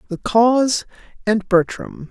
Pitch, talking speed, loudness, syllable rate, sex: 215 Hz, 115 wpm, -18 LUFS, 3.9 syllables/s, female